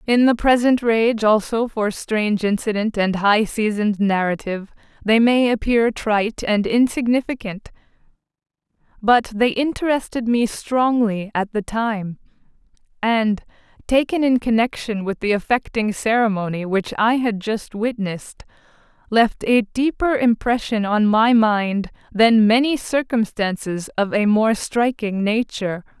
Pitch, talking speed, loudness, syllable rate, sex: 220 Hz, 125 wpm, -19 LUFS, 4.3 syllables/s, female